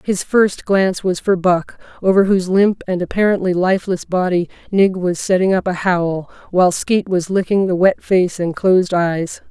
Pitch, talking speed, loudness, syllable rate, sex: 185 Hz, 185 wpm, -16 LUFS, 4.9 syllables/s, female